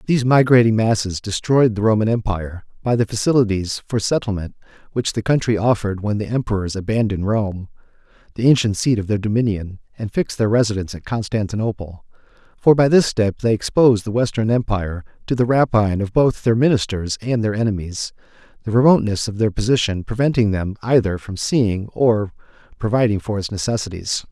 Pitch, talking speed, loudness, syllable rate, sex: 110 Hz, 165 wpm, -19 LUFS, 5.9 syllables/s, male